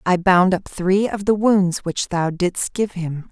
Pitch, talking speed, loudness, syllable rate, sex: 185 Hz, 215 wpm, -19 LUFS, 3.8 syllables/s, female